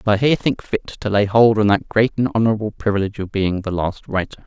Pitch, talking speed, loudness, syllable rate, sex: 105 Hz, 255 wpm, -19 LUFS, 6.3 syllables/s, male